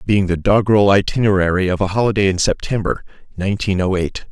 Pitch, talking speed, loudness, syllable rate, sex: 100 Hz, 165 wpm, -17 LUFS, 6.3 syllables/s, male